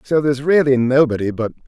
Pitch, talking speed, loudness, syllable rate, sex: 135 Hz, 180 wpm, -16 LUFS, 6.1 syllables/s, male